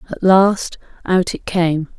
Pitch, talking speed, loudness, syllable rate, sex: 180 Hz, 150 wpm, -16 LUFS, 3.4 syllables/s, female